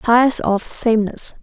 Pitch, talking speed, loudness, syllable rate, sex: 230 Hz, 125 wpm, -17 LUFS, 4.5 syllables/s, female